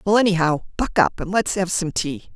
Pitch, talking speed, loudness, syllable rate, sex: 185 Hz, 230 wpm, -21 LUFS, 5.4 syllables/s, female